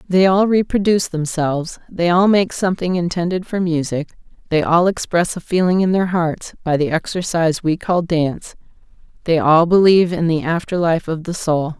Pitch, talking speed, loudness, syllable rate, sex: 170 Hz, 180 wpm, -17 LUFS, 5.2 syllables/s, female